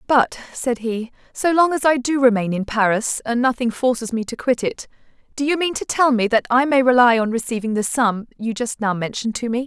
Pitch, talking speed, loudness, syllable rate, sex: 240 Hz, 235 wpm, -19 LUFS, 5.4 syllables/s, female